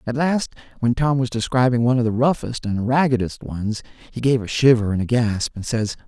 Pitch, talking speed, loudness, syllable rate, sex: 120 Hz, 215 wpm, -20 LUFS, 5.5 syllables/s, male